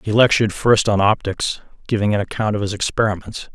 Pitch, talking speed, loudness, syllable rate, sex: 105 Hz, 185 wpm, -18 LUFS, 6.0 syllables/s, male